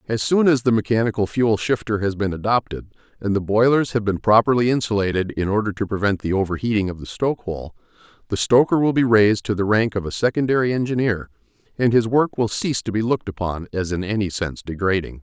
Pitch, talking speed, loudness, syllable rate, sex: 110 Hz, 210 wpm, -20 LUFS, 6.2 syllables/s, male